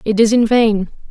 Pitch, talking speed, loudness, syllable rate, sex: 220 Hz, 215 wpm, -14 LUFS, 4.7 syllables/s, female